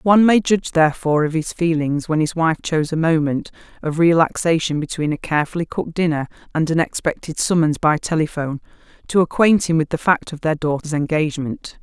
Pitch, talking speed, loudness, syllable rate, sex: 160 Hz, 185 wpm, -19 LUFS, 6.0 syllables/s, female